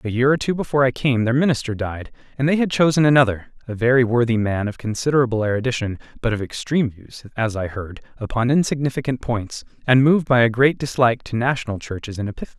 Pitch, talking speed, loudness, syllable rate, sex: 125 Hz, 205 wpm, -20 LUFS, 6.6 syllables/s, male